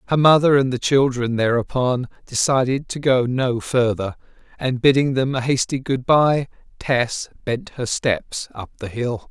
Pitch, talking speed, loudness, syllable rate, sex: 130 Hz, 155 wpm, -20 LUFS, 4.3 syllables/s, male